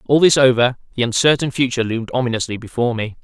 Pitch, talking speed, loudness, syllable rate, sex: 125 Hz, 185 wpm, -17 LUFS, 7.3 syllables/s, male